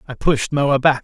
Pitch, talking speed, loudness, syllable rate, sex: 140 Hz, 235 wpm, -18 LUFS, 4.6 syllables/s, male